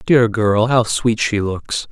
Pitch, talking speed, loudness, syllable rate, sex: 110 Hz, 190 wpm, -17 LUFS, 3.4 syllables/s, male